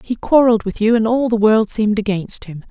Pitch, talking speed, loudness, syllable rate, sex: 215 Hz, 245 wpm, -15 LUFS, 5.8 syllables/s, female